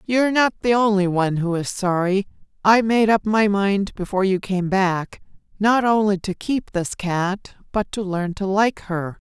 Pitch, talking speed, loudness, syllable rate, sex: 200 Hz, 190 wpm, -20 LUFS, 4.5 syllables/s, female